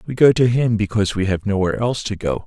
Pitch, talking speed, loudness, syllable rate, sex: 105 Hz, 270 wpm, -18 LUFS, 6.9 syllables/s, male